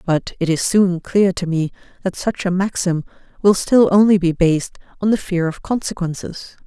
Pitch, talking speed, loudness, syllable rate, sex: 185 Hz, 190 wpm, -18 LUFS, 5.1 syllables/s, female